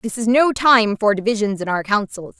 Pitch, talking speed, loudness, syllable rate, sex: 215 Hz, 225 wpm, -17 LUFS, 5.2 syllables/s, female